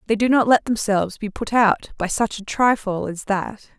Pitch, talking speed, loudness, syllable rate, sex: 215 Hz, 220 wpm, -20 LUFS, 4.9 syllables/s, female